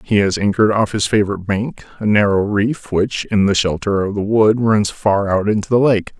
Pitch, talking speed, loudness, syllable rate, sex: 105 Hz, 225 wpm, -16 LUFS, 5.3 syllables/s, male